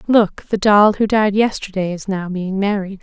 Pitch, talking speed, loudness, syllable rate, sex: 200 Hz, 200 wpm, -17 LUFS, 4.5 syllables/s, female